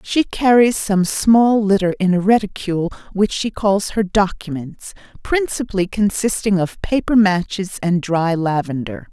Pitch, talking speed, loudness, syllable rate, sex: 195 Hz, 140 wpm, -17 LUFS, 4.4 syllables/s, female